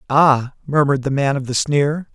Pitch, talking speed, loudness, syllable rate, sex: 140 Hz, 195 wpm, -18 LUFS, 5.0 syllables/s, male